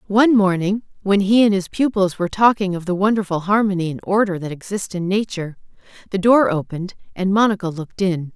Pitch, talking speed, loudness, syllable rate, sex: 195 Hz, 185 wpm, -19 LUFS, 6.1 syllables/s, female